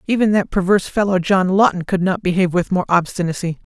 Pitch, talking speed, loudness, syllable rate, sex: 185 Hz, 195 wpm, -17 LUFS, 6.5 syllables/s, female